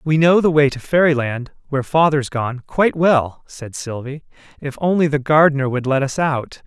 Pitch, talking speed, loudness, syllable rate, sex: 145 Hz, 170 wpm, -17 LUFS, 5.0 syllables/s, male